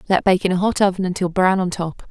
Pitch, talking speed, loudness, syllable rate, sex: 185 Hz, 285 wpm, -19 LUFS, 6.3 syllables/s, female